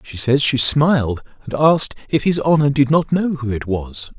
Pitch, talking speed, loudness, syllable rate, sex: 135 Hz, 215 wpm, -17 LUFS, 4.9 syllables/s, male